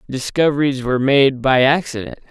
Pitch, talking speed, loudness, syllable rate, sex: 135 Hz, 130 wpm, -16 LUFS, 5.4 syllables/s, male